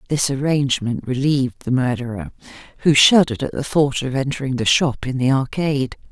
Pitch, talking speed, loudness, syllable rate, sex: 135 Hz, 165 wpm, -19 LUFS, 5.7 syllables/s, female